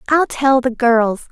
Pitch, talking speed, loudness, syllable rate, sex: 250 Hz, 185 wpm, -15 LUFS, 3.6 syllables/s, female